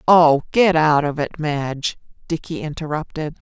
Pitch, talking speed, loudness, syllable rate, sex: 155 Hz, 135 wpm, -19 LUFS, 4.5 syllables/s, female